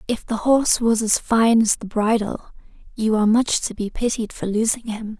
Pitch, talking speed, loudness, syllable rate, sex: 220 Hz, 210 wpm, -20 LUFS, 5.1 syllables/s, female